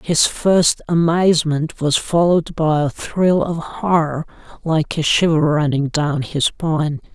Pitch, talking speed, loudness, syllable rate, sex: 160 Hz, 145 wpm, -17 LUFS, 4.0 syllables/s, male